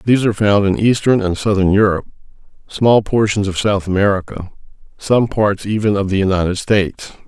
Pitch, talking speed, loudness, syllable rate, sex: 100 Hz, 165 wpm, -15 LUFS, 5.8 syllables/s, male